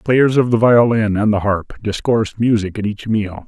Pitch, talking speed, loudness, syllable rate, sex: 110 Hz, 205 wpm, -16 LUFS, 4.9 syllables/s, male